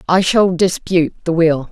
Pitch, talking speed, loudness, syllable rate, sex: 175 Hz, 175 wpm, -15 LUFS, 4.9 syllables/s, female